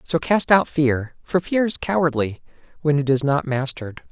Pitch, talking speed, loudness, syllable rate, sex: 150 Hz, 175 wpm, -20 LUFS, 4.9 syllables/s, male